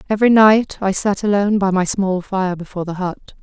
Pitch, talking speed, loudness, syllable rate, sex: 195 Hz, 210 wpm, -17 LUFS, 5.7 syllables/s, female